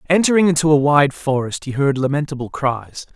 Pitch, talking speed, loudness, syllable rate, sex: 145 Hz, 170 wpm, -17 LUFS, 5.5 syllables/s, male